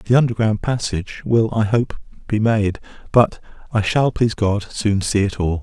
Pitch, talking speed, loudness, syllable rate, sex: 110 Hz, 180 wpm, -19 LUFS, 4.8 syllables/s, male